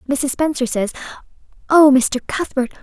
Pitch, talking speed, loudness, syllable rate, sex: 270 Hz, 105 wpm, -17 LUFS, 4.8 syllables/s, female